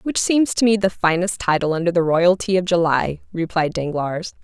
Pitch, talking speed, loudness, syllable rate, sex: 180 Hz, 190 wpm, -19 LUFS, 5.1 syllables/s, female